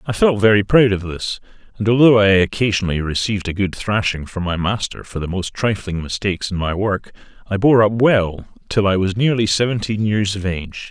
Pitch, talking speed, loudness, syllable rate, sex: 100 Hz, 205 wpm, -18 LUFS, 5.5 syllables/s, male